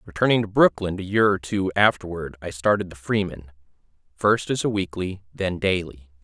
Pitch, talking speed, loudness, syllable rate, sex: 95 Hz, 175 wpm, -23 LUFS, 5.1 syllables/s, male